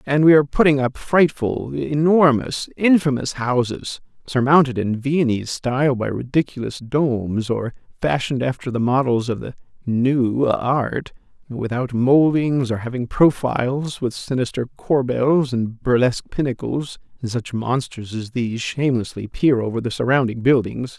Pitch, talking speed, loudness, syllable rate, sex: 130 Hz, 135 wpm, -20 LUFS, 4.6 syllables/s, male